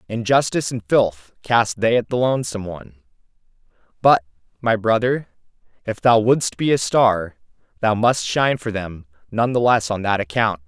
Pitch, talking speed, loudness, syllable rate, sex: 110 Hz, 165 wpm, -19 LUFS, 5.1 syllables/s, male